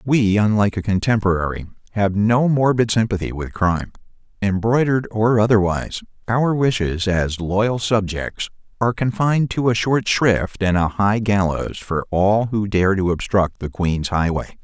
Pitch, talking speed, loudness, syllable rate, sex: 105 Hz, 150 wpm, -19 LUFS, 4.7 syllables/s, male